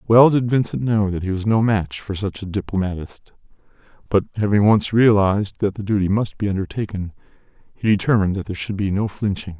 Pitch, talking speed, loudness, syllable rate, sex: 100 Hz, 195 wpm, -20 LUFS, 6.0 syllables/s, male